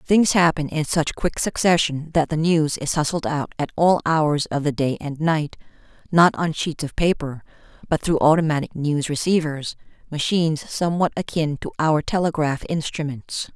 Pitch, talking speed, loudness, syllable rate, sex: 155 Hz, 165 wpm, -21 LUFS, 4.7 syllables/s, female